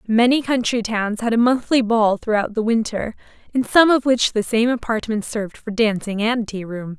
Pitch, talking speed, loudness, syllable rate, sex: 225 Hz, 195 wpm, -19 LUFS, 5.0 syllables/s, female